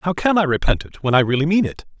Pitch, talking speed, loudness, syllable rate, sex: 155 Hz, 300 wpm, -19 LUFS, 6.5 syllables/s, male